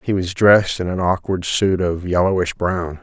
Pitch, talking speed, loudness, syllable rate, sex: 90 Hz, 200 wpm, -18 LUFS, 4.8 syllables/s, male